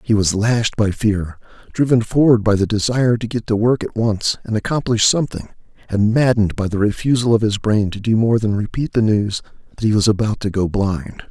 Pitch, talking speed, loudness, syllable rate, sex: 110 Hz, 220 wpm, -17 LUFS, 5.4 syllables/s, male